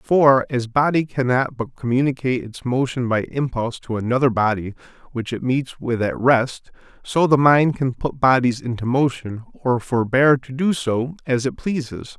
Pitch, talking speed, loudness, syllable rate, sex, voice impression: 130 Hz, 170 wpm, -20 LUFS, 4.7 syllables/s, male, very masculine, very adult-like, slightly thick, slightly muffled, cool, sincere, friendly